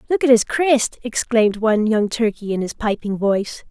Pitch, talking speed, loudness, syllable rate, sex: 225 Hz, 195 wpm, -18 LUFS, 5.2 syllables/s, female